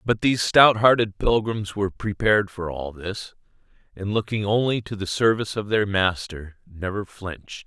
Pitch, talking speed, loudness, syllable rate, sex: 100 Hz, 165 wpm, -22 LUFS, 4.9 syllables/s, male